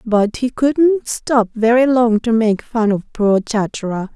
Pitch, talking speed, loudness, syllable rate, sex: 230 Hz, 175 wpm, -16 LUFS, 3.7 syllables/s, female